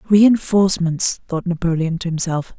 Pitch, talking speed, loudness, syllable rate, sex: 180 Hz, 115 wpm, -18 LUFS, 4.8 syllables/s, female